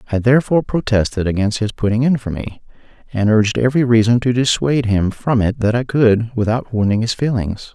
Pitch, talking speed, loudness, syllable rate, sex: 115 Hz, 195 wpm, -16 LUFS, 5.9 syllables/s, male